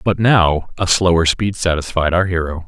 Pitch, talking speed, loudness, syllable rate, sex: 90 Hz, 180 wpm, -16 LUFS, 4.8 syllables/s, male